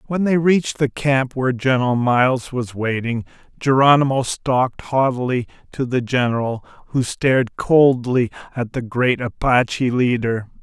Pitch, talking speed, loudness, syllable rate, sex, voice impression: 125 Hz, 135 wpm, -19 LUFS, 4.7 syllables/s, male, very masculine, middle-aged, slightly thick, slightly powerful, intellectual, slightly calm, slightly mature